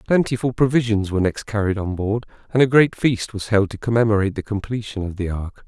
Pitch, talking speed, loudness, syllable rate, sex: 110 Hz, 210 wpm, -20 LUFS, 6.1 syllables/s, male